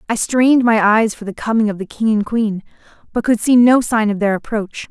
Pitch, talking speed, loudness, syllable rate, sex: 220 Hz, 245 wpm, -16 LUFS, 5.4 syllables/s, female